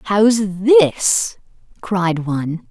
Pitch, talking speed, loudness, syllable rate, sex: 185 Hz, 90 wpm, -16 LUFS, 2.4 syllables/s, female